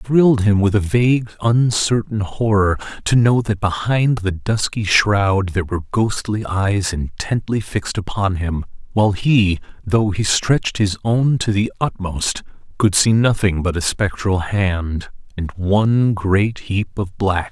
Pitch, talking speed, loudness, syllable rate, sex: 105 Hz, 160 wpm, -18 LUFS, 4.2 syllables/s, male